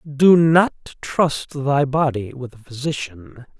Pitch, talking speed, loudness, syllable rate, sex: 140 Hz, 135 wpm, -18 LUFS, 3.3 syllables/s, male